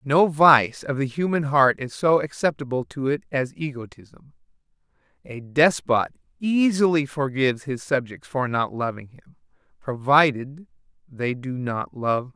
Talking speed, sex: 145 wpm, male